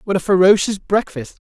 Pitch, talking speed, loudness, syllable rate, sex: 190 Hz, 165 wpm, -16 LUFS, 5.6 syllables/s, male